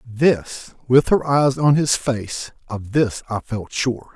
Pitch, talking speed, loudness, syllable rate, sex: 125 Hz, 175 wpm, -19 LUFS, 3.3 syllables/s, male